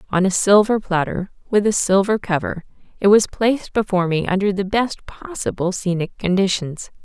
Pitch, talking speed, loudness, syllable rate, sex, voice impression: 195 Hz, 160 wpm, -19 LUFS, 5.2 syllables/s, female, feminine, adult-like, tensed, powerful, clear, intellectual, calm, friendly, elegant, lively, slightly sharp